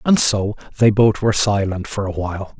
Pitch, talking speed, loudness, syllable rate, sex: 105 Hz, 210 wpm, -18 LUFS, 5.5 syllables/s, male